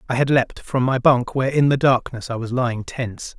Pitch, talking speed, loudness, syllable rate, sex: 125 Hz, 250 wpm, -20 LUFS, 5.9 syllables/s, male